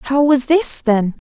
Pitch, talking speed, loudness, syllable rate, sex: 270 Hz, 190 wpm, -15 LUFS, 3.4 syllables/s, female